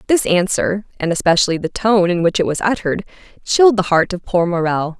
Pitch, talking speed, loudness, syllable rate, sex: 185 Hz, 205 wpm, -16 LUFS, 5.9 syllables/s, female